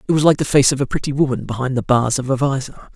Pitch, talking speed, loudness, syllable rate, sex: 135 Hz, 305 wpm, -18 LUFS, 6.9 syllables/s, male